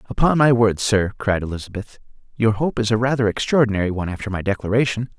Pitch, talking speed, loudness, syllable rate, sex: 110 Hz, 185 wpm, -20 LUFS, 6.5 syllables/s, male